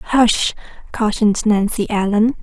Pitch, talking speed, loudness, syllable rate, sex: 215 Hz, 100 wpm, -17 LUFS, 4.8 syllables/s, female